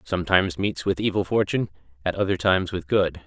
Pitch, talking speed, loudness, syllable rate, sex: 90 Hz, 185 wpm, -23 LUFS, 6.4 syllables/s, male